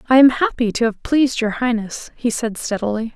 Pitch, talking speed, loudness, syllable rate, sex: 235 Hz, 210 wpm, -18 LUFS, 5.5 syllables/s, female